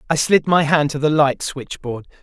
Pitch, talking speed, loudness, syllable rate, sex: 150 Hz, 215 wpm, -18 LUFS, 4.7 syllables/s, male